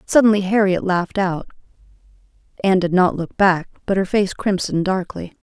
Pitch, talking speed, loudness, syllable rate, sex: 190 Hz, 155 wpm, -19 LUFS, 5.6 syllables/s, female